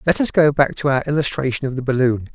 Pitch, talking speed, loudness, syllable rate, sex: 140 Hz, 255 wpm, -18 LUFS, 6.5 syllables/s, male